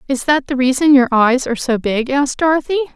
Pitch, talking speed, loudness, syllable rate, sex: 270 Hz, 225 wpm, -15 LUFS, 6.3 syllables/s, female